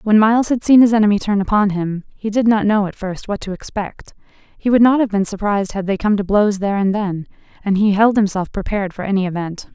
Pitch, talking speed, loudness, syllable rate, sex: 205 Hz, 245 wpm, -17 LUFS, 6.1 syllables/s, female